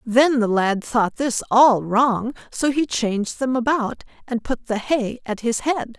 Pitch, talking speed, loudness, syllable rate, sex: 240 Hz, 190 wpm, -20 LUFS, 3.9 syllables/s, female